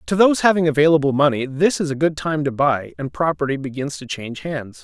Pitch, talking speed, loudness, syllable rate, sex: 145 Hz, 225 wpm, -19 LUFS, 6.0 syllables/s, male